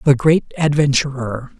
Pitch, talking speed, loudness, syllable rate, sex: 140 Hz, 115 wpm, -17 LUFS, 4.4 syllables/s, male